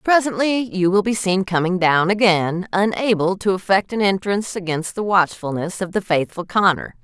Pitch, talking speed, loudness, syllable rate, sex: 190 Hz, 170 wpm, -19 LUFS, 5.0 syllables/s, female